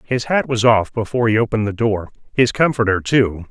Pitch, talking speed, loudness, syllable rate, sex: 110 Hz, 205 wpm, -17 LUFS, 5.7 syllables/s, male